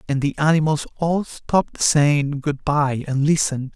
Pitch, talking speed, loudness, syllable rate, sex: 145 Hz, 160 wpm, -20 LUFS, 4.3 syllables/s, male